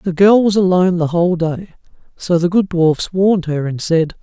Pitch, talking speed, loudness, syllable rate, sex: 175 Hz, 215 wpm, -15 LUFS, 5.2 syllables/s, male